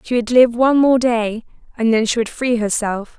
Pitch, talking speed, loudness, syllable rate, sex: 235 Hz, 225 wpm, -16 LUFS, 5.1 syllables/s, female